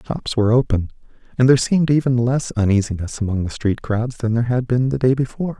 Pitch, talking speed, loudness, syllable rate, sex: 120 Hz, 215 wpm, -19 LUFS, 6.4 syllables/s, male